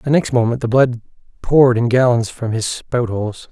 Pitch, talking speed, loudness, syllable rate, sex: 120 Hz, 205 wpm, -16 LUFS, 5.2 syllables/s, male